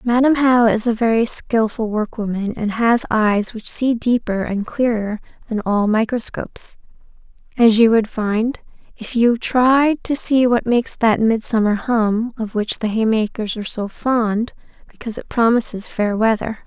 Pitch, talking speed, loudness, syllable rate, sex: 225 Hz, 160 wpm, -18 LUFS, 4.4 syllables/s, female